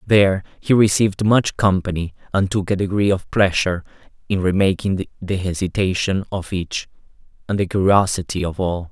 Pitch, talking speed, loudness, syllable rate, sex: 95 Hz, 150 wpm, -19 LUFS, 5.3 syllables/s, male